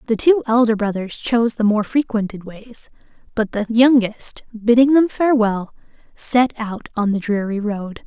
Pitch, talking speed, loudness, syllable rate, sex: 225 Hz, 155 wpm, -18 LUFS, 4.6 syllables/s, female